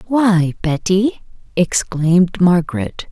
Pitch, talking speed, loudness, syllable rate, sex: 180 Hz, 75 wpm, -16 LUFS, 3.5 syllables/s, female